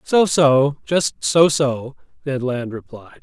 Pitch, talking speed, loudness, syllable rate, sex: 140 Hz, 150 wpm, -18 LUFS, 3.3 syllables/s, male